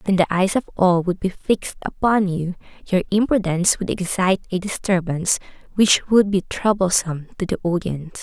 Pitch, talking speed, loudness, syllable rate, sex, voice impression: 185 Hz, 170 wpm, -20 LUFS, 5.4 syllables/s, female, very feminine, slightly young, slightly adult-like, thin, slightly relaxed, slightly weak, slightly dark, soft, slightly clear, fluent, very cute, intellectual, very refreshing, sincere, very calm, very friendly, very reassuring, very unique, very elegant, slightly wild, slightly sweet, very kind, modest